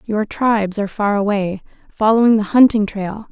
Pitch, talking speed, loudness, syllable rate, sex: 210 Hz, 165 wpm, -16 LUFS, 5.1 syllables/s, female